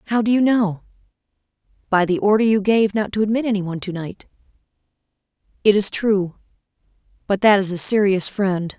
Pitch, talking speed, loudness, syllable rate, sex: 205 Hz, 170 wpm, -18 LUFS, 5.7 syllables/s, female